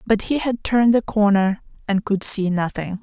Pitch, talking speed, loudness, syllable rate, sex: 205 Hz, 200 wpm, -19 LUFS, 4.9 syllables/s, female